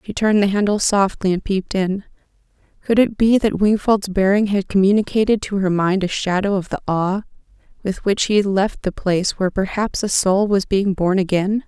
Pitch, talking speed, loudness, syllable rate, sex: 200 Hz, 200 wpm, -18 LUFS, 5.4 syllables/s, female